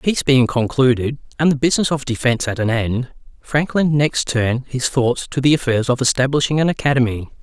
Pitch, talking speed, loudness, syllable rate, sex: 130 Hz, 185 wpm, -18 LUFS, 5.8 syllables/s, male